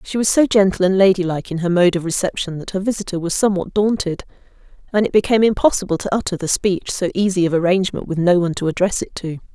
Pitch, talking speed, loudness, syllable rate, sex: 185 Hz, 225 wpm, -18 LUFS, 6.9 syllables/s, female